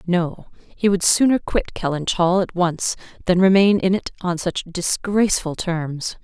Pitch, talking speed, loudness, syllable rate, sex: 180 Hz, 165 wpm, -20 LUFS, 4.2 syllables/s, female